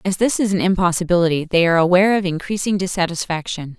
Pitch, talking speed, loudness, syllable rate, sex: 180 Hz, 175 wpm, -18 LUFS, 6.9 syllables/s, female